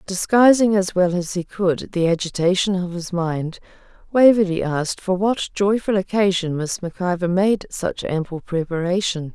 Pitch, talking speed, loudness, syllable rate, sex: 185 Hz, 155 wpm, -20 LUFS, 4.6 syllables/s, female